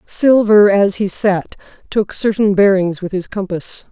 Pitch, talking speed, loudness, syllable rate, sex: 200 Hz, 155 wpm, -15 LUFS, 4.1 syllables/s, female